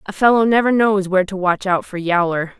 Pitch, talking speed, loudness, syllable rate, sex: 195 Hz, 230 wpm, -17 LUFS, 5.7 syllables/s, female